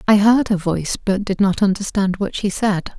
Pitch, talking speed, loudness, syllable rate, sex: 200 Hz, 220 wpm, -18 LUFS, 5.2 syllables/s, female